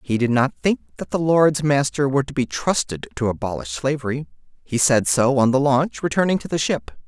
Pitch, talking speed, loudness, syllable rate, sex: 130 Hz, 210 wpm, -20 LUFS, 5.4 syllables/s, male